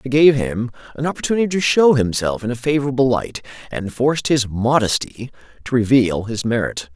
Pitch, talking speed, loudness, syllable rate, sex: 125 Hz, 175 wpm, -18 LUFS, 5.6 syllables/s, male